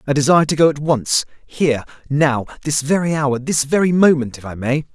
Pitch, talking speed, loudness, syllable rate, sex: 145 Hz, 160 wpm, -17 LUFS, 5.6 syllables/s, male